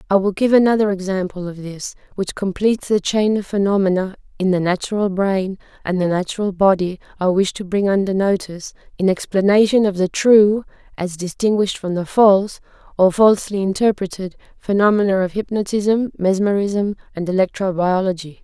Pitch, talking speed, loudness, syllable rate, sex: 195 Hz, 155 wpm, -18 LUFS, 5.4 syllables/s, female